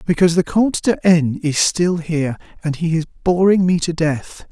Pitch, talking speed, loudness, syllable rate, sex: 165 Hz, 200 wpm, -17 LUFS, 4.8 syllables/s, male